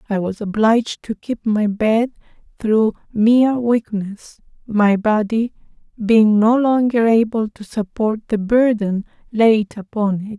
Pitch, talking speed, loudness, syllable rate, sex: 220 Hz, 135 wpm, -17 LUFS, 3.9 syllables/s, female